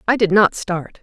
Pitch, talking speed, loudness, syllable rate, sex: 195 Hz, 235 wpm, -17 LUFS, 4.7 syllables/s, female